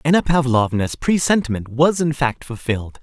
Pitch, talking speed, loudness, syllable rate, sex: 135 Hz, 140 wpm, -19 LUFS, 5.1 syllables/s, male